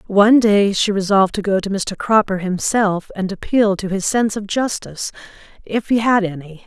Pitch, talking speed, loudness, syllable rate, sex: 200 Hz, 190 wpm, -17 LUFS, 5.2 syllables/s, female